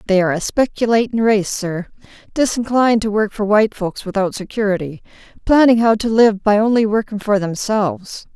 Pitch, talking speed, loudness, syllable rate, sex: 210 Hz, 165 wpm, -16 LUFS, 5.5 syllables/s, female